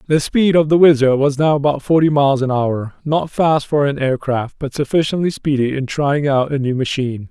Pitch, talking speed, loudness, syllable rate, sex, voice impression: 140 Hz, 220 wpm, -16 LUFS, 5.3 syllables/s, male, masculine, adult-like, intellectual, slightly sincere, slightly calm